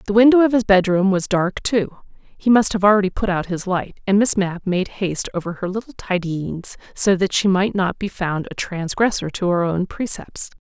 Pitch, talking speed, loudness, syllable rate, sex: 195 Hz, 215 wpm, -19 LUFS, 5.0 syllables/s, female